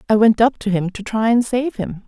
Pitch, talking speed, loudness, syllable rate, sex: 220 Hz, 290 wpm, -18 LUFS, 5.3 syllables/s, female